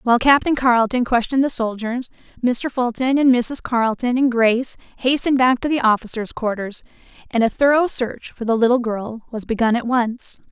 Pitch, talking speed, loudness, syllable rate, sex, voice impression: 240 Hz, 175 wpm, -19 LUFS, 5.4 syllables/s, female, feminine, slightly young, tensed, powerful, bright, clear, fluent, slightly cute, friendly, lively, slightly sharp